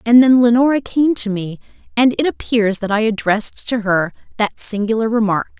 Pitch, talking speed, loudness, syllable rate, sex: 225 Hz, 180 wpm, -16 LUFS, 5.2 syllables/s, female